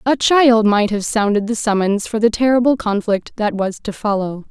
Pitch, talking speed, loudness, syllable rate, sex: 220 Hz, 200 wpm, -16 LUFS, 4.9 syllables/s, female